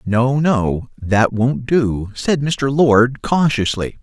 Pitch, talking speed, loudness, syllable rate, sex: 125 Hz, 135 wpm, -17 LUFS, 2.9 syllables/s, male